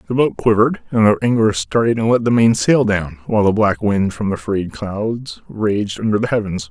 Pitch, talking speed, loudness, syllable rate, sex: 105 Hz, 225 wpm, -17 LUFS, 5.0 syllables/s, male